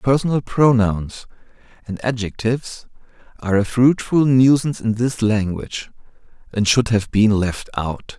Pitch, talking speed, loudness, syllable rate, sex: 115 Hz, 125 wpm, -18 LUFS, 4.6 syllables/s, male